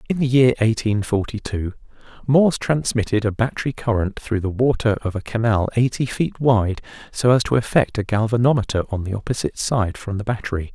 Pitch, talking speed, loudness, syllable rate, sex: 115 Hz, 185 wpm, -20 LUFS, 5.7 syllables/s, male